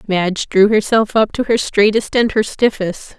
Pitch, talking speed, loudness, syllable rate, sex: 210 Hz, 190 wpm, -15 LUFS, 4.6 syllables/s, female